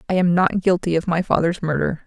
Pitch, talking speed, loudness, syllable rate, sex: 175 Hz, 235 wpm, -19 LUFS, 5.9 syllables/s, female